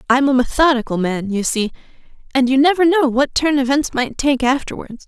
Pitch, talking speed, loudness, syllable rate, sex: 265 Hz, 200 wpm, -16 LUFS, 5.6 syllables/s, female